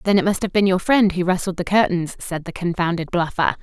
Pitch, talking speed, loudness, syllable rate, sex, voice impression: 180 Hz, 250 wpm, -20 LUFS, 5.8 syllables/s, female, feminine, slightly gender-neutral, slightly old, thin, slightly relaxed, powerful, very bright, hard, very clear, very fluent, slightly raspy, cool, intellectual, refreshing, slightly sincere, slightly calm, slightly friendly, slightly reassuring, slightly unique, slightly elegant, slightly wild, very lively, strict, very intense, very sharp